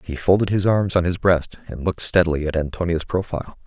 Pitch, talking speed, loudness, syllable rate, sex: 85 Hz, 215 wpm, -21 LUFS, 6.1 syllables/s, male